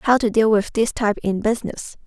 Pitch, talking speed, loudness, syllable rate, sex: 220 Hz, 230 wpm, -20 LUFS, 6.0 syllables/s, female